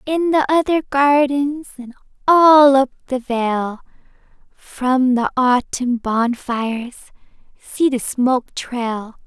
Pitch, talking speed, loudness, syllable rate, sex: 260 Hz, 110 wpm, -17 LUFS, 3.3 syllables/s, female